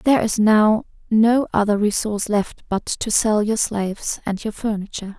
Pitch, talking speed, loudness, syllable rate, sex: 210 Hz, 175 wpm, -20 LUFS, 4.8 syllables/s, female